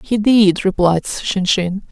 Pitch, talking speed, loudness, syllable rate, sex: 195 Hz, 125 wpm, -15 LUFS, 3.4 syllables/s, female